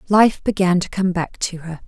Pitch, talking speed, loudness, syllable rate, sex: 185 Hz, 225 wpm, -19 LUFS, 4.8 syllables/s, female